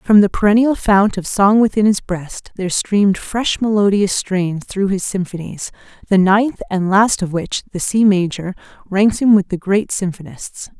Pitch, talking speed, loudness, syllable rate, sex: 195 Hz, 180 wpm, -16 LUFS, 4.5 syllables/s, female